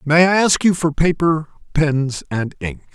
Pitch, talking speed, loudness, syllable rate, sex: 155 Hz, 185 wpm, -17 LUFS, 4.2 syllables/s, male